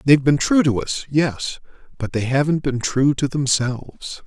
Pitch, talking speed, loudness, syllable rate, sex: 135 Hz, 185 wpm, -19 LUFS, 4.6 syllables/s, male